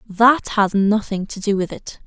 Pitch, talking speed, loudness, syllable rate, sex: 205 Hz, 205 wpm, -18 LUFS, 4.1 syllables/s, female